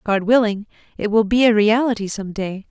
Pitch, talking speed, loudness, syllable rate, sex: 215 Hz, 200 wpm, -18 LUFS, 5.2 syllables/s, female